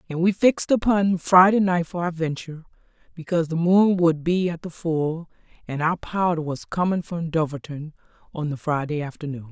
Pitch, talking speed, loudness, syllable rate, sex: 165 Hz, 175 wpm, -22 LUFS, 5.2 syllables/s, female